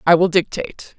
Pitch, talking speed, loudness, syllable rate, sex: 170 Hz, 185 wpm, -18 LUFS, 5.8 syllables/s, female